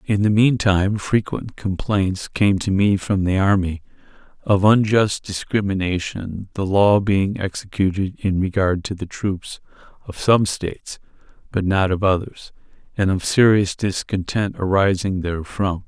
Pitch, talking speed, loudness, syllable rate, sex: 100 Hz, 140 wpm, -20 LUFS, 4.3 syllables/s, male